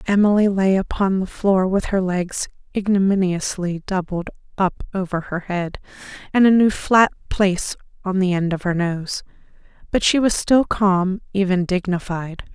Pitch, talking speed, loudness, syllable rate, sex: 190 Hz, 155 wpm, -20 LUFS, 4.5 syllables/s, female